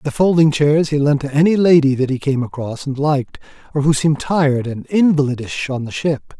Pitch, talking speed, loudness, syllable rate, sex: 145 Hz, 215 wpm, -16 LUFS, 5.6 syllables/s, male